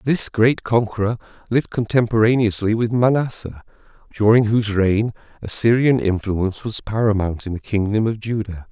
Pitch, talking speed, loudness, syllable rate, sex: 110 Hz, 130 wpm, -19 LUFS, 5.2 syllables/s, male